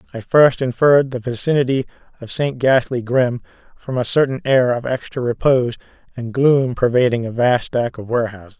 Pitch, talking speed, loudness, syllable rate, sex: 125 Hz, 170 wpm, -17 LUFS, 5.4 syllables/s, male